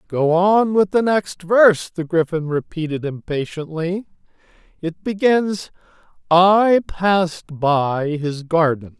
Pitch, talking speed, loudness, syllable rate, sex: 175 Hz, 115 wpm, -18 LUFS, 3.6 syllables/s, male